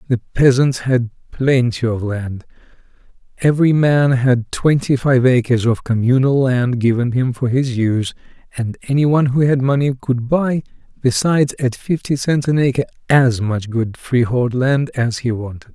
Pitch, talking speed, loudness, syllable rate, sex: 125 Hz, 160 wpm, -17 LUFS, 4.7 syllables/s, male